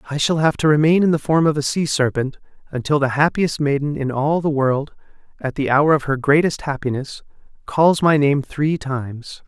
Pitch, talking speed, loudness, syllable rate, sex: 145 Hz, 205 wpm, -18 LUFS, 5.1 syllables/s, male